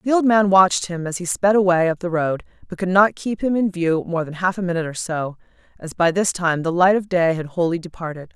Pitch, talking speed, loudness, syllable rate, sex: 180 Hz, 265 wpm, -19 LUFS, 5.8 syllables/s, female